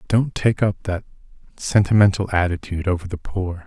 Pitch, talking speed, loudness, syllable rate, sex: 95 Hz, 145 wpm, -21 LUFS, 5.4 syllables/s, male